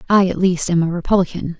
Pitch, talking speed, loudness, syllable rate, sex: 180 Hz, 225 wpm, -17 LUFS, 6.4 syllables/s, female